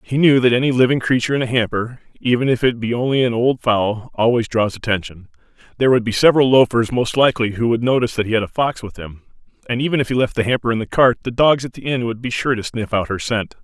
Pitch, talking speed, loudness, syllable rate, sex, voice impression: 120 Hz, 265 wpm, -17 LUFS, 6.5 syllables/s, male, masculine, adult-like, middle-aged, thick, very tensed, powerful, very bright, slightly hard, very clear, very fluent, very cool, intellectual, very refreshing, sincere, very calm, very mature, very friendly, very reassuring, very unique, very elegant, slightly wild, very sweet, very lively, very kind